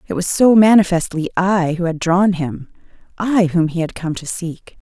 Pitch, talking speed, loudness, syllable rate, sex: 180 Hz, 195 wpm, -16 LUFS, 4.6 syllables/s, female